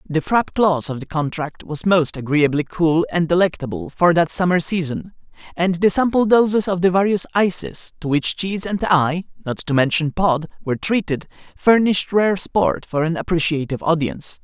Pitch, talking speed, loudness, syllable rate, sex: 170 Hz, 175 wpm, -19 LUFS, 5.2 syllables/s, male